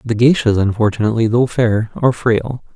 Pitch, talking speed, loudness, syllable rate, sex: 115 Hz, 155 wpm, -15 LUFS, 5.5 syllables/s, male